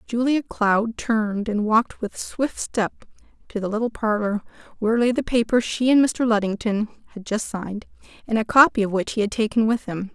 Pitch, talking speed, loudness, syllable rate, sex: 220 Hz, 195 wpm, -22 LUFS, 5.3 syllables/s, female